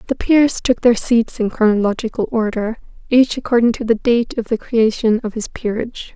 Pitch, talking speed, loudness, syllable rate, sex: 230 Hz, 185 wpm, -17 LUFS, 5.2 syllables/s, female